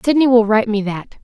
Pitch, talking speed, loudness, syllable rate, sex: 225 Hz, 245 wpm, -15 LUFS, 6.3 syllables/s, female